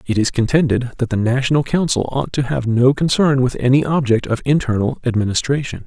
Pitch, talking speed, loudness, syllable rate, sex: 130 Hz, 185 wpm, -17 LUFS, 5.7 syllables/s, male